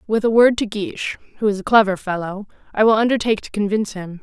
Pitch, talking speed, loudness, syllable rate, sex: 210 Hz, 225 wpm, -19 LUFS, 6.7 syllables/s, female